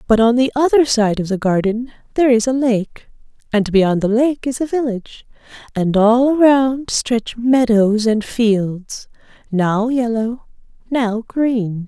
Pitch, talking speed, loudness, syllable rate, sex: 235 Hz, 150 wpm, -16 LUFS, 3.9 syllables/s, female